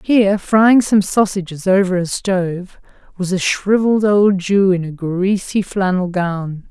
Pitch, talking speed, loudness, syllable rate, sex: 190 Hz, 150 wpm, -16 LUFS, 4.2 syllables/s, female